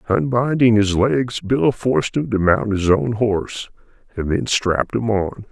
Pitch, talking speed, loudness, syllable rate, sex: 110 Hz, 175 wpm, -18 LUFS, 4.3 syllables/s, male